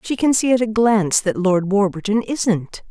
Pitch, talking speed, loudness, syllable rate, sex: 210 Hz, 205 wpm, -18 LUFS, 4.7 syllables/s, female